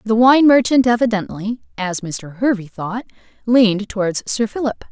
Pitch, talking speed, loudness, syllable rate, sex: 220 Hz, 145 wpm, -17 LUFS, 4.8 syllables/s, female